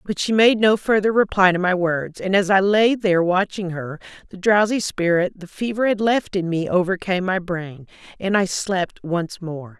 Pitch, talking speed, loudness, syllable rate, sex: 190 Hz, 200 wpm, -20 LUFS, 4.8 syllables/s, female